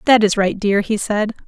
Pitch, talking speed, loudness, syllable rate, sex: 210 Hz, 245 wpm, -17 LUFS, 4.9 syllables/s, female